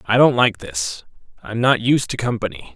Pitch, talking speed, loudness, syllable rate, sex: 115 Hz, 220 wpm, -19 LUFS, 5.3 syllables/s, male